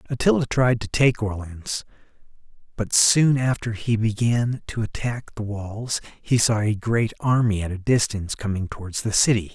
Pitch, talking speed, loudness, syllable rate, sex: 110 Hz, 165 wpm, -22 LUFS, 4.7 syllables/s, male